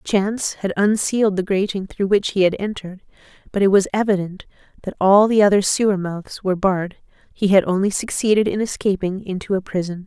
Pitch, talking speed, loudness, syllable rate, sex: 195 Hz, 185 wpm, -19 LUFS, 5.8 syllables/s, female